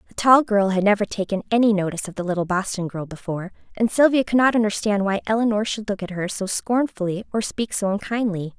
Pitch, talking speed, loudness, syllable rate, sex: 205 Hz, 215 wpm, -21 LUFS, 6.2 syllables/s, female